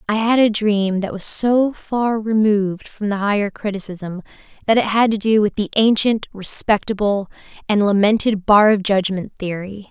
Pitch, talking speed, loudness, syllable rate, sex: 210 Hz, 170 wpm, -18 LUFS, 4.7 syllables/s, female